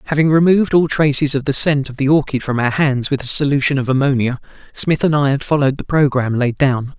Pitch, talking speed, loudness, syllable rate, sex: 140 Hz, 230 wpm, -16 LUFS, 6.2 syllables/s, male